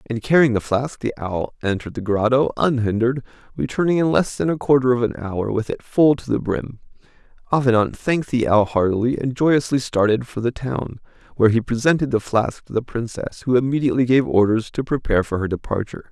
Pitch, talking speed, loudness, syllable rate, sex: 120 Hz, 195 wpm, -20 LUFS, 5.9 syllables/s, male